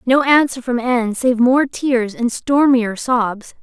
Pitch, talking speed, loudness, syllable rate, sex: 245 Hz, 165 wpm, -16 LUFS, 3.8 syllables/s, female